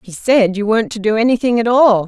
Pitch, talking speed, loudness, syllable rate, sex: 220 Hz, 260 wpm, -14 LUFS, 6.1 syllables/s, female